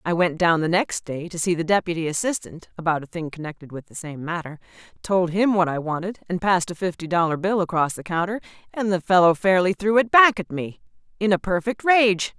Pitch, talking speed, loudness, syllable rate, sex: 180 Hz, 225 wpm, -22 LUFS, 4.9 syllables/s, female